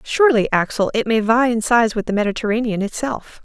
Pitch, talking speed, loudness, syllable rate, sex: 225 Hz, 190 wpm, -18 LUFS, 5.9 syllables/s, female